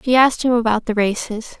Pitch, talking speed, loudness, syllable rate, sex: 235 Hz, 225 wpm, -18 LUFS, 6.0 syllables/s, female